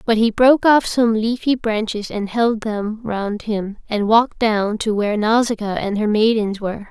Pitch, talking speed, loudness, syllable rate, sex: 220 Hz, 190 wpm, -18 LUFS, 4.7 syllables/s, female